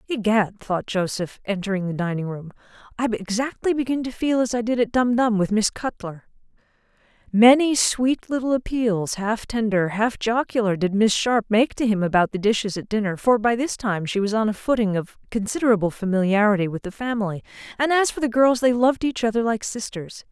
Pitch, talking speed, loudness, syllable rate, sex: 220 Hz, 190 wpm, -22 LUFS, 5.5 syllables/s, female